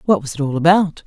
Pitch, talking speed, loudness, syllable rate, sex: 160 Hz, 280 wpm, -16 LUFS, 6.5 syllables/s, female